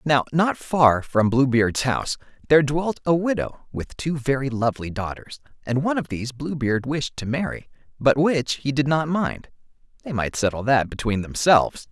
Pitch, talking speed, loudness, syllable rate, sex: 135 Hz, 175 wpm, -22 LUFS, 5.0 syllables/s, male